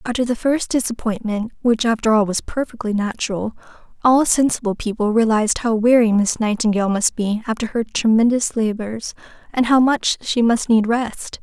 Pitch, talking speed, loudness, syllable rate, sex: 225 Hz, 150 wpm, -18 LUFS, 5.1 syllables/s, female